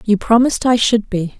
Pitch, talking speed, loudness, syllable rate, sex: 225 Hz, 215 wpm, -15 LUFS, 5.5 syllables/s, female